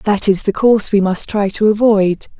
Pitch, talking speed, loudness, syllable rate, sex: 205 Hz, 225 wpm, -14 LUFS, 4.9 syllables/s, female